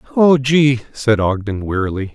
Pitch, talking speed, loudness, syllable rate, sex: 120 Hz, 140 wpm, -16 LUFS, 4.7 syllables/s, male